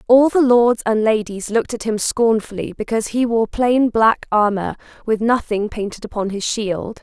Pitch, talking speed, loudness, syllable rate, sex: 225 Hz, 180 wpm, -18 LUFS, 4.8 syllables/s, female